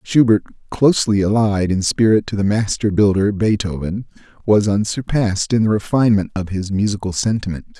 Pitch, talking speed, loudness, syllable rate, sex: 105 Hz, 145 wpm, -17 LUFS, 5.4 syllables/s, male